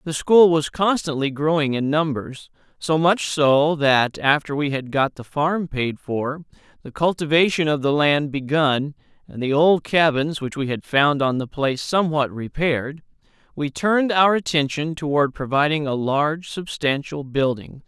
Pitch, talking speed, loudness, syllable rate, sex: 150 Hz, 160 wpm, -20 LUFS, 4.5 syllables/s, male